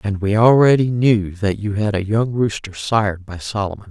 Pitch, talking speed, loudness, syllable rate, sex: 105 Hz, 200 wpm, -17 LUFS, 5.0 syllables/s, female